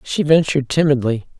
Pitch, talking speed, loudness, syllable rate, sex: 150 Hz, 130 wpm, -16 LUFS, 5.7 syllables/s, female